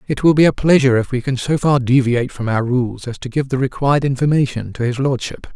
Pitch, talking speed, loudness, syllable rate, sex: 130 Hz, 250 wpm, -17 LUFS, 6.1 syllables/s, male